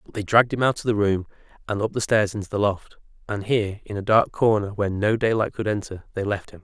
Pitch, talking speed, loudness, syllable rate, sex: 105 Hz, 260 wpm, -23 LUFS, 6.4 syllables/s, male